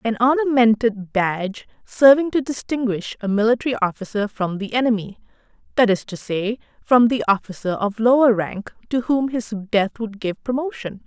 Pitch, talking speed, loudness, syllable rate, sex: 225 Hz, 150 wpm, -20 LUFS, 5.0 syllables/s, female